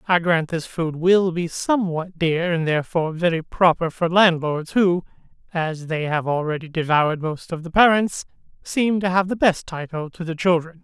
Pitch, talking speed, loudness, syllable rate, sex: 170 Hz, 185 wpm, -21 LUFS, 4.9 syllables/s, male